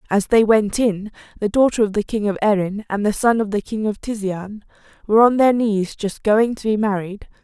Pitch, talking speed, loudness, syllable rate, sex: 210 Hz, 225 wpm, -19 LUFS, 5.2 syllables/s, female